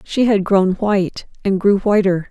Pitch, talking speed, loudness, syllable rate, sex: 195 Hz, 185 wpm, -16 LUFS, 4.4 syllables/s, female